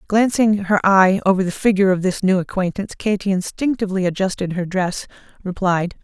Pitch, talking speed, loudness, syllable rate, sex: 190 Hz, 160 wpm, -18 LUFS, 5.8 syllables/s, female